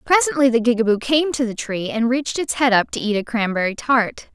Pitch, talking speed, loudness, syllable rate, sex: 245 Hz, 235 wpm, -19 LUFS, 5.7 syllables/s, female